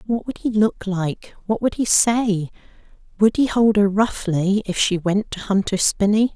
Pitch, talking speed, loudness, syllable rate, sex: 205 Hz, 190 wpm, -19 LUFS, 4.3 syllables/s, female